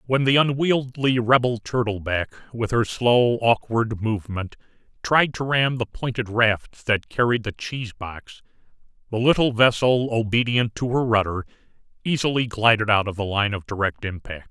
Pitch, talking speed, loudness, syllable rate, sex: 115 Hz, 155 wpm, -22 LUFS, 4.7 syllables/s, male